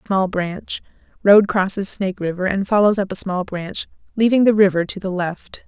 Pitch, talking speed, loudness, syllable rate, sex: 195 Hz, 180 wpm, -19 LUFS, 5.0 syllables/s, female